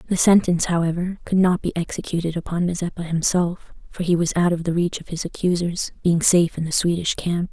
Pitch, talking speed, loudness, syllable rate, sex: 175 Hz, 205 wpm, -21 LUFS, 5.9 syllables/s, female